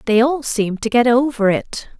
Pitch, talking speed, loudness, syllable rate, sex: 240 Hz, 210 wpm, -17 LUFS, 4.6 syllables/s, female